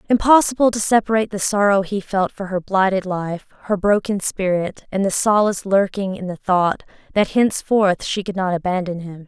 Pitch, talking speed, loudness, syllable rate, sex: 195 Hz, 180 wpm, -19 LUFS, 5.3 syllables/s, female